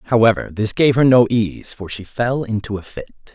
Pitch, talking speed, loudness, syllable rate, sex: 110 Hz, 215 wpm, -17 LUFS, 4.9 syllables/s, male